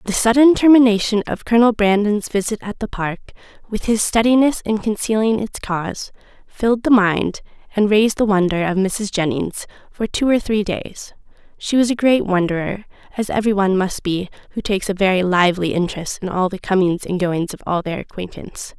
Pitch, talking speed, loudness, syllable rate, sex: 205 Hz, 185 wpm, -18 LUFS, 5.6 syllables/s, female